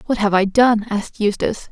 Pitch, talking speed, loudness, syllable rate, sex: 215 Hz, 210 wpm, -17 LUFS, 5.9 syllables/s, female